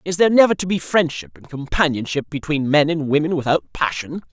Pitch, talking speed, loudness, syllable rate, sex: 150 Hz, 195 wpm, -19 LUFS, 5.9 syllables/s, male